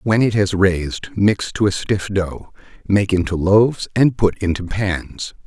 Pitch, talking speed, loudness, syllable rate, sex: 100 Hz, 175 wpm, -18 LUFS, 4.1 syllables/s, male